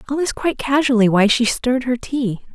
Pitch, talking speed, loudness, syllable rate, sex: 250 Hz, 210 wpm, -18 LUFS, 6.4 syllables/s, female